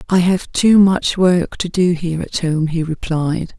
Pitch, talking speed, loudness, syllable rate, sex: 175 Hz, 200 wpm, -16 LUFS, 4.1 syllables/s, female